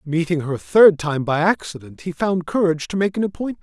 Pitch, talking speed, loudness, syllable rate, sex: 170 Hz, 230 wpm, -19 LUFS, 6.0 syllables/s, male